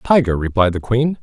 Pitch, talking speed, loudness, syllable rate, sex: 115 Hz, 195 wpm, -17 LUFS, 5.4 syllables/s, male